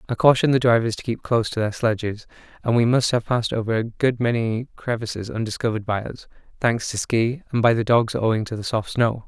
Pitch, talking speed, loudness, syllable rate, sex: 115 Hz, 225 wpm, -22 LUFS, 6.1 syllables/s, male